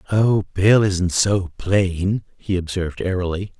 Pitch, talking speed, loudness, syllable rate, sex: 95 Hz, 135 wpm, -20 LUFS, 4.0 syllables/s, male